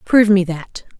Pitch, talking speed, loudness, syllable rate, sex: 195 Hz, 180 wpm, -15 LUFS, 5.2 syllables/s, female